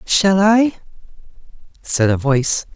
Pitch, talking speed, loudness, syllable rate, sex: 175 Hz, 110 wpm, -16 LUFS, 3.9 syllables/s, male